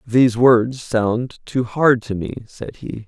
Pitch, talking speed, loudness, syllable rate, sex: 120 Hz, 175 wpm, -18 LUFS, 3.5 syllables/s, male